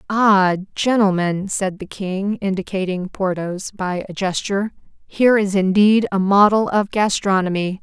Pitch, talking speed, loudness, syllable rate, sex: 195 Hz, 130 wpm, -18 LUFS, 4.3 syllables/s, female